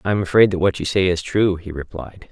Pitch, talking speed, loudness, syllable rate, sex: 90 Hz, 285 wpm, -19 LUFS, 5.9 syllables/s, male